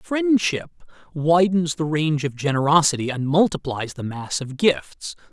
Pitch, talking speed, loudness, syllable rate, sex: 155 Hz, 135 wpm, -21 LUFS, 4.4 syllables/s, male